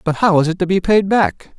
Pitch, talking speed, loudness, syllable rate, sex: 180 Hz, 300 wpm, -15 LUFS, 5.4 syllables/s, male